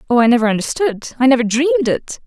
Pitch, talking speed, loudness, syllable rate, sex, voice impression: 250 Hz, 185 wpm, -15 LUFS, 7.0 syllables/s, female, feminine, adult-like, tensed, powerful, clear, fluent, intellectual, calm, reassuring, elegant, slightly sharp